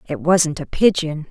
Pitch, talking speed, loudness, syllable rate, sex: 165 Hz, 185 wpm, -18 LUFS, 4.5 syllables/s, female